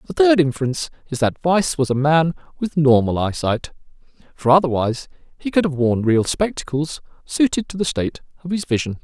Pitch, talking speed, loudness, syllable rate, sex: 150 Hz, 180 wpm, -19 LUFS, 5.8 syllables/s, male